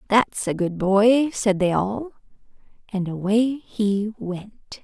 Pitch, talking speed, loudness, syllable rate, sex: 210 Hz, 135 wpm, -22 LUFS, 3.7 syllables/s, female